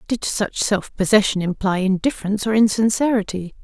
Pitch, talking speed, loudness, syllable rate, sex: 205 Hz, 130 wpm, -19 LUFS, 5.6 syllables/s, female